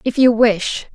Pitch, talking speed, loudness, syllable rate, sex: 230 Hz, 190 wpm, -15 LUFS, 3.9 syllables/s, female